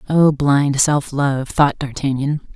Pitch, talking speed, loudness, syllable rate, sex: 140 Hz, 140 wpm, -17 LUFS, 3.5 syllables/s, female